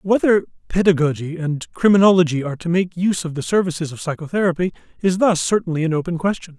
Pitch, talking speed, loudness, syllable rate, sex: 170 Hz, 175 wpm, -19 LUFS, 6.5 syllables/s, male